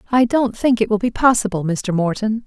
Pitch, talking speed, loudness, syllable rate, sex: 220 Hz, 220 wpm, -18 LUFS, 5.4 syllables/s, female